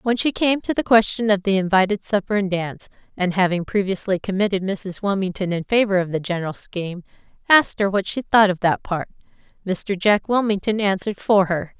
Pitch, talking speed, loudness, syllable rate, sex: 195 Hz, 195 wpm, -20 LUFS, 5.7 syllables/s, female